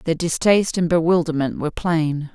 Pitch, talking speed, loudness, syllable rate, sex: 165 Hz, 155 wpm, -19 LUFS, 5.2 syllables/s, female